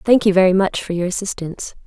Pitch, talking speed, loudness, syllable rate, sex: 190 Hz, 225 wpm, -18 LUFS, 6.5 syllables/s, female